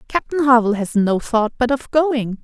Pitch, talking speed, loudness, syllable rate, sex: 245 Hz, 195 wpm, -17 LUFS, 4.9 syllables/s, female